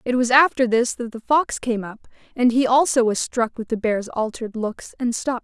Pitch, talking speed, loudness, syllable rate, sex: 240 Hz, 230 wpm, -20 LUFS, 5.2 syllables/s, female